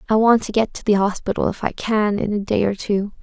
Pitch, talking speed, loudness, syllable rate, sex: 210 Hz, 280 wpm, -20 LUFS, 5.7 syllables/s, female